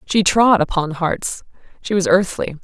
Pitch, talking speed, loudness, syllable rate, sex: 185 Hz, 160 wpm, -17 LUFS, 4.3 syllables/s, female